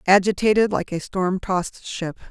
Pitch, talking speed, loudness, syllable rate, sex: 190 Hz, 155 wpm, -22 LUFS, 4.8 syllables/s, female